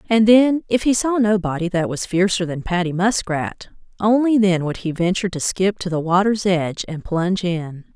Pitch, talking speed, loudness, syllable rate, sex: 190 Hz, 180 wpm, -19 LUFS, 5.1 syllables/s, female